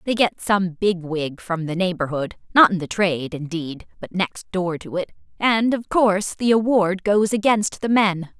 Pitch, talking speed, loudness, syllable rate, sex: 190 Hz, 180 wpm, -21 LUFS, 4.4 syllables/s, female